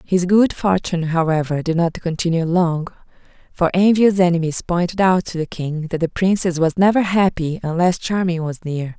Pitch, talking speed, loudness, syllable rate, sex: 175 Hz, 175 wpm, -18 LUFS, 5.0 syllables/s, female